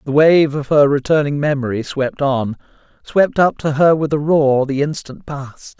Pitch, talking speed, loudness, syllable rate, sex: 145 Hz, 175 wpm, -16 LUFS, 4.5 syllables/s, male